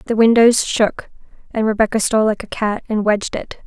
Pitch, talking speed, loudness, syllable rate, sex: 220 Hz, 195 wpm, -16 LUFS, 5.7 syllables/s, female